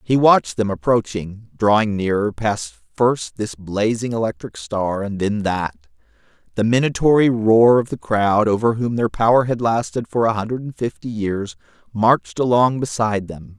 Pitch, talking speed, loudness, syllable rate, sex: 110 Hz, 165 wpm, -19 LUFS, 4.7 syllables/s, male